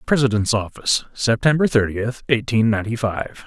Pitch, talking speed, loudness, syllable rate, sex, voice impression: 115 Hz, 120 wpm, -20 LUFS, 5.3 syllables/s, male, very masculine, very adult-like, slightly thick, intellectual, sincere, calm, slightly mature